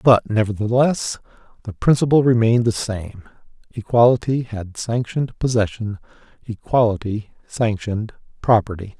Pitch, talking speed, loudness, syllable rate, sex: 110 Hz, 95 wpm, -19 LUFS, 4.9 syllables/s, male